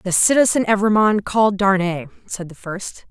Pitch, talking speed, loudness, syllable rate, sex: 200 Hz, 155 wpm, -17 LUFS, 5.3 syllables/s, female